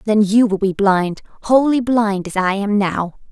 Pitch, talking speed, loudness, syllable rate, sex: 210 Hz, 200 wpm, -16 LUFS, 4.2 syllables/s, female